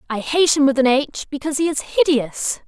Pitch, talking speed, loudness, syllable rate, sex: 280 Hz, 225 wpm, -18 LUFS, 5.9 syllables/s, female